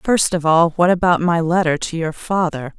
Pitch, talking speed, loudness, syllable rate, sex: 170 Hz, 215 wpm, -17 LUFS, 4.9 syllables/s, female